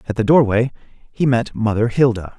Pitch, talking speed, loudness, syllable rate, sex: 115 Hz, 175 wpm, -17 LUFS, 4.8 syllables/s, male